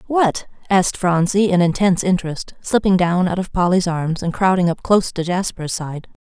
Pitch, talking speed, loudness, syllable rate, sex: 180 Hz, 180 wpm, -18 LUFS, 5.3 syllables/s, female